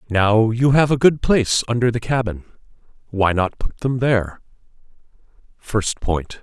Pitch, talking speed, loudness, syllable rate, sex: 115 Hz, 140 wpm, -18 LUFS, 4.7 syllables/s, male